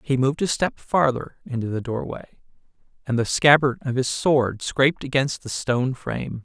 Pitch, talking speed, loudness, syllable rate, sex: 130 Hz, 175 wpm, -22 LUFS, 5.0 syllables/s, male